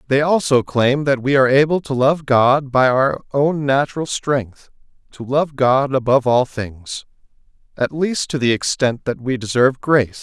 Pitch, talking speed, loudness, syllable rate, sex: 135 Hz, 175 wpm, -17 LUFS, 4.7 syllables/s, male